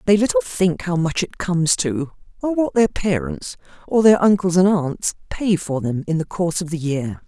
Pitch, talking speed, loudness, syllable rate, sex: 170 Hz, 215 wpm, -19 LUFS, 5.0 syllables/s, female